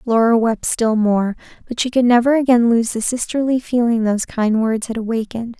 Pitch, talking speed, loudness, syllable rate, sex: 230 Hz, 195 wpm, -17 LUFS, 5.4 syllables/s, female